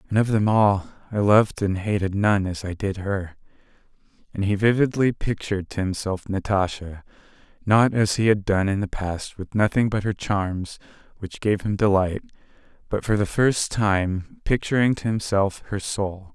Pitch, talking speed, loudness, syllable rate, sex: 100 Hz, 170 wpm, -23 LUFS, 4.7 syllables/s, male